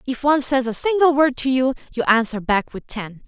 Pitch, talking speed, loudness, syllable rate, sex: 255 Hz, 240 wpm, -19 LUFS, 5.5 syllables/s, female